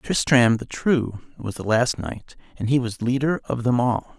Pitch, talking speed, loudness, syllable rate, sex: 125 Hz, 200 wpm, -22 LUFS, 4.2 syllables/s, male